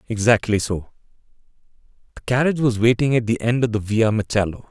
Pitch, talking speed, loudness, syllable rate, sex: 115 Hz, 165 wpm, -20 LUFS, 6.1 syllables/s, male